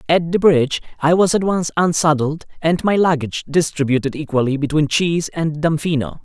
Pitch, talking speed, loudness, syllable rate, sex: 155 Hz, 165 wpm, -17 LUFS, 5.5 syllables/s, male